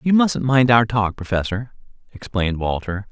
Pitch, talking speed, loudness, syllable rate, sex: 110 Hz, 155 wpm, -19 LUFS, 5.0 syllables/s, male